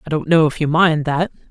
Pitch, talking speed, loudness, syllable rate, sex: 155 Hz, 280 wpm, -16 LUFS, 5.8 syllables/s, female